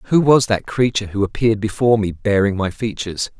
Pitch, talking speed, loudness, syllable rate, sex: 105 Hz, 195 wpm, -18 LUFS, 6.0 syllables/s, male